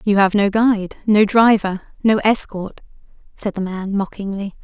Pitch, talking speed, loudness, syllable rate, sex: 205 Hz, 155 wpm, -17 LUFS, 4.6 syllables/s, female